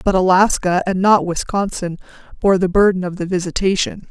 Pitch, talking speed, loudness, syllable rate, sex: 185 Hz, 160 wpm, -17 LUFS, 5.4 syllables/s, female